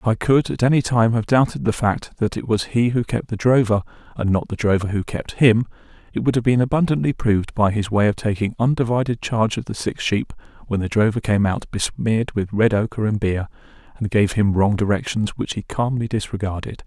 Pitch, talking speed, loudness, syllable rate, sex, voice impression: 110 Hz, 220 wpm, -20 LUFS, 5.6 syllables/s, male, very masculine, very adult-like, slightly muffled, sweet